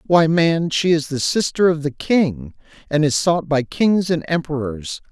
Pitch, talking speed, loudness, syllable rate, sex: 160 Hz, 190 wpm, -18 LUFS, 4.2 syllables/s, male